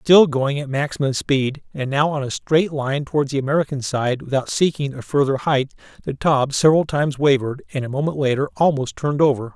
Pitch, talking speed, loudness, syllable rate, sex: 140 Hz, 200 wpm, -20 LUFS, 5.8 syllables/s, male